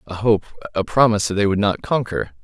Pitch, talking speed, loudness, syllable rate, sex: 105 Hz, 195 wpm, -19 LUFS, 6.0 syllables/s, male